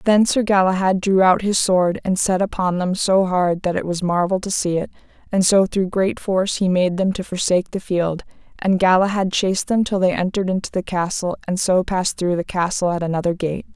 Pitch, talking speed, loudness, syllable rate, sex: 185 Hz, 225 wpm, -19 LUFS, 5.4 syllables/s, female